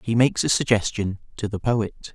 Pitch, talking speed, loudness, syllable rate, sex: 110 Hz, 195 wpm, -23 LUFS, 5.3 syllables/s, male